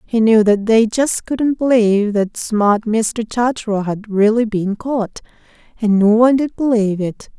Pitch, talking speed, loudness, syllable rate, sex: 220 Hz, 170 wpm, -16 LUFS, 4.4 syllables/s, female